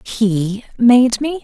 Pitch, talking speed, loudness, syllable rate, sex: 235 Hz, 125 wpm, -15 LUFS, 2.6 syllables/s, female